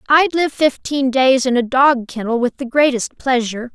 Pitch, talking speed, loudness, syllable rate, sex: 260 Hz, 190 wpm, -16 LUFS, 4.8 syllables/s, female